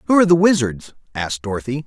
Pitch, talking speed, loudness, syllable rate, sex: 145 Hz, 195 wpm, -18 LUFS, 7.3 syllables/s, male